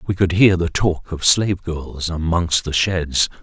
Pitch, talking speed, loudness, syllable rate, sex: 85 Hz, 195 wpm, -18 LUFS, 4.1 syllables/s, male